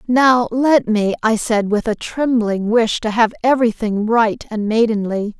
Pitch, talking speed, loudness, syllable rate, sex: 225 Hz, 180 wpm, -17 LUFS, 4.2 syllables/s, female